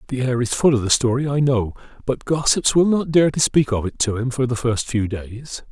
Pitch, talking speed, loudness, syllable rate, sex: 125 Hz, 265 wpm, -19 LUFS, 5.3 syllables/s, male